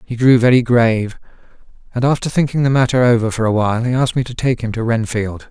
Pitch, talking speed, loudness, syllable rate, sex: 120 Hz, 220 wpm, -16 LUFS, 6.2 syllables/s, male